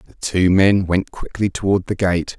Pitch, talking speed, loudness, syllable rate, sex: 95 Hz, 200 wpm, -18 LUFS, 4.7 syllables/s, male